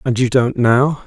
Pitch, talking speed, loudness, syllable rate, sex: 125 Hz, 225 wpm, -15 LUFS, 4.1 syllables/s, male